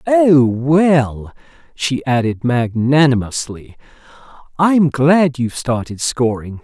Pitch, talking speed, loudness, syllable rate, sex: 135 Hz, 90 wpm, -15 LUFS, 3.4 syllables/s, male